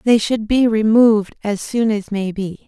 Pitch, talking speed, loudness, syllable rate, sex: 215 Hz, 200 wpm, -17 LUFS, 4.6 syllables/s, female